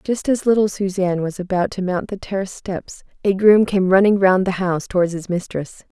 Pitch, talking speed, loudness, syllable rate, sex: 190 Hz, 210 wpm, -19 LUFS, 5.6 syllables/s, female